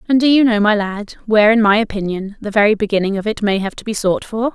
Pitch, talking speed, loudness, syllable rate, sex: 210 Hz, 275 wpm, -16 LUFS, 6.4 syllables/s, female